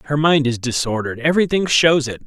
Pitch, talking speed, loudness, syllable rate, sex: 140 Hz, 160 wpm, -17 LUFS, 6.3 syllables/s, male